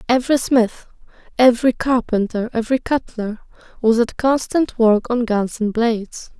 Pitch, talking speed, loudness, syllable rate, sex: 235 Hz, 130 wpm, -18 LUFS, 4.8 syllables/s, female